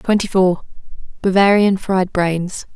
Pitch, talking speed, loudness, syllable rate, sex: 190 Hz, 85 wpm, -16 LUFS, 3.9 syllables/s, female